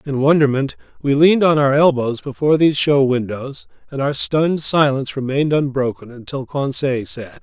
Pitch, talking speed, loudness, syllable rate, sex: 140 Hz, 160 wpm, -17 LUFS, 5.4 syllables/s, male